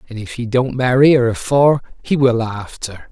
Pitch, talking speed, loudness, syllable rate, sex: 125 Hz, 195 wpm, -16 LUFS, 5.2 syllables/s, male